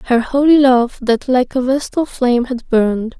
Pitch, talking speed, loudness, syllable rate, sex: 250 Hz, 190 wpm, -15 LUFS, 4.8 syllables/s, female